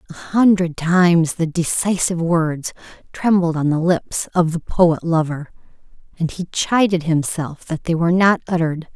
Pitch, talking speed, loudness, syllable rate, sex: 170 Hz, 155 wpm, -18 LUFS, 5.0 syllables/s, female